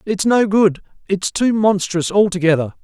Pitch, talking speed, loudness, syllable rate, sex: 190 Hz, 150 wpm, -16 LUFS, 4.7 syllables/s, male